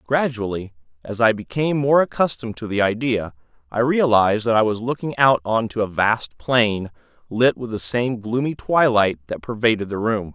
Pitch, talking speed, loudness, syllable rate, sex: 115 Hz, 180 wpm, -20 LUFS, 5.1 syllables/s, male